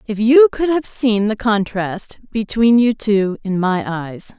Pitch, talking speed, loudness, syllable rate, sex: 220 Hz, 180 wpm, -16 LUFS, 3.7 syllables/s, female